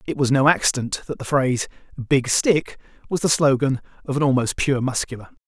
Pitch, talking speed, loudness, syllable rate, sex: 135 Hz, 185 wpm, -21 LUFS, 5.6 syllables/s, male